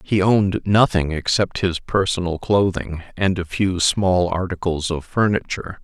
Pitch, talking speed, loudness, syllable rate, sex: 90 Hz, 145 wpm, -20 LUFS, 4.5 syllables/s, male